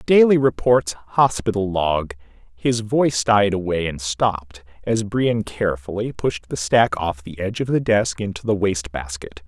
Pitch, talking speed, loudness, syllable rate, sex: 100 Hz, 160 wpm, -20 LUFS, 4.5 syllables/s, male